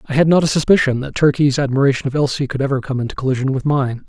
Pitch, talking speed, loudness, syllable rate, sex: 135 Hz, 250 wpm, -17 LUFS, 7.1 syllables/s, male